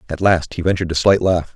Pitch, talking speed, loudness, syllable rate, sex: 90 Hz, 270 wpm, -17 LUFS, 6.6 syllables/s, male